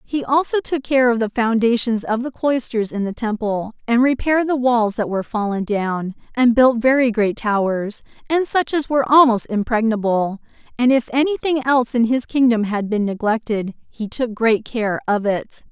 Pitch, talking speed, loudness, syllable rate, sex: 235 Hz, 185 wpm, -19 LUFS, 4.9 syllables/s, female